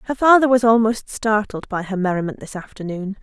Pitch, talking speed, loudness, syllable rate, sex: 215 Hz, 185 wpm, -18 LUFS, 5.7 syllables/s, female